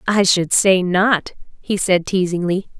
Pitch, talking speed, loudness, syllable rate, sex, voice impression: 185 Hz, 150 wpm, -17 LUFS, 3.9 syllables/s, female, feminine, adult-like, slightly relaxed, powerful, soft, fluent, raspy, intellectual, slightly calm, elegant, lively, slightly sharp